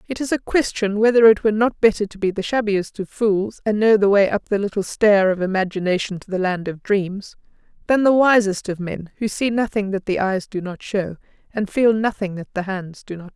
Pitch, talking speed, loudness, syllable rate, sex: 205 Hz, 240 wpm, -19 LUFS, 5.4 syllables/s, female